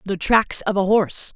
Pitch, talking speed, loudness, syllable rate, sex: 200 Hz, 220 wpm, -19 LUFS, 5.3 syllables/s, female